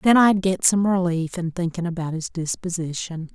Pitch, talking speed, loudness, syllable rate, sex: 175 Hz, 180 wpm, -22 LUFS, 4.9 syllables/s, female